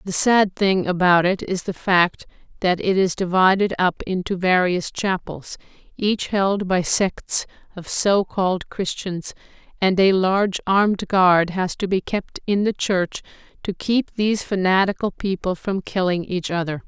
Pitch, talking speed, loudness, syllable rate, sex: 190 Hz, 155 wpm, -20 LUFS, 4.3 syllables/s, female